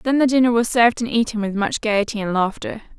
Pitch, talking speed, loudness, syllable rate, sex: 225 Hz, 240 wpm, -19 LUFS, 6.2 syllables/s, female